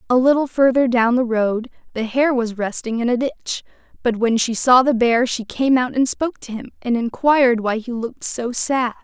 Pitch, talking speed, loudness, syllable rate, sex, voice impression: 245 Hz, 220 wpm, -19 LUFS, 5.2 syllables/s, female, feminine, slightly young, tensed, powerful, bright, soft, slightly muffled, friendly, slightly reassuring, lively